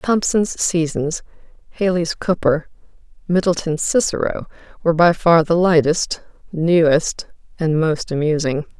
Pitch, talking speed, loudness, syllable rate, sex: 165 Hz, 100 wpm, -18 LUFS, 4.2 syllables/s, female